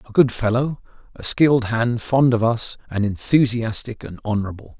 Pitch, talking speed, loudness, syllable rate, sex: 115 Hz, 165 wpm, -20 LUFS, 5.1 syllables/s, male